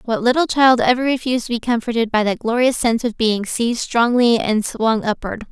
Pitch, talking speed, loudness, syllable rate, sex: 235 Hz, 205 wpm, -17 LUFS, 5.6 syllables/s, female